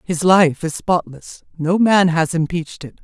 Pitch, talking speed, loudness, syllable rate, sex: 170 Hz, 180 wpm, -17 LUFS, 4.3 syllables/s, female